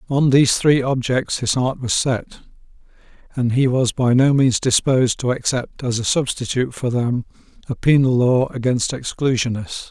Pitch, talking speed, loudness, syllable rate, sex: 130 Hz, 165 wpm, -18 LUFS, 4.8 syllables/s, male